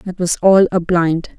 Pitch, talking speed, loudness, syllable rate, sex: 175 Hz, 215 wpm, -14 LUFS, 4.0 syllables/s, female